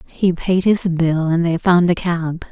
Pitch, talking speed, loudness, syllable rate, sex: 175 Hz, 215 wpm, -17 LUFS, 3.8 syllables/s, female